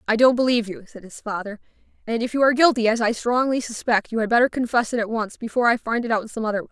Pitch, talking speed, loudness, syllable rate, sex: 230 Hz, 285 wpm, -21 LUFS, 7.3 syllables/s, female